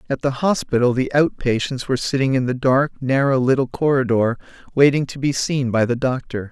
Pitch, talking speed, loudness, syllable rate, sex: 130 Hz, 195 wpm, -19 LUFS, 5.5 syllables/s, male